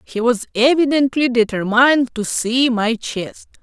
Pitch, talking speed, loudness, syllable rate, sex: 245 Hz, 135 wpm, -17 LUFS, 4.3 syllables/s, female